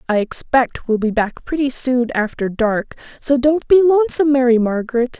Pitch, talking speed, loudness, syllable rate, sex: 255 Hz, 175 wpm, -17 LUFS, 5.0 syllables/s, female